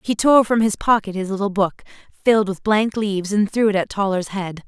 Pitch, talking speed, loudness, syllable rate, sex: 205 Hz, 230 wpm, -19 LUFS, 5.4 syllables/s, female